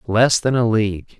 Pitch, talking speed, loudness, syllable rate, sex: 110 Hz, 200 wpm, -17 LUFS, 5.1 syllables/s, male